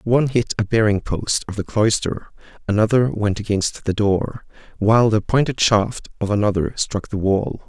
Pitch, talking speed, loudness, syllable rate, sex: 105 Hz, 170 wpm, -19 LUFS, 4.8 syllables/s, male